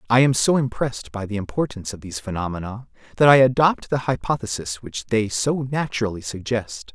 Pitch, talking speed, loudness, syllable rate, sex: 115 Hz, 175 wpm, -22 LUFS, 5.7 syllables/s, male